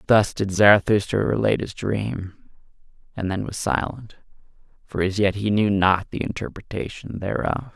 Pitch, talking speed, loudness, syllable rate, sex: 100 Hz, 145 wpm, -22 LUFS, 4.8 syllables/s, male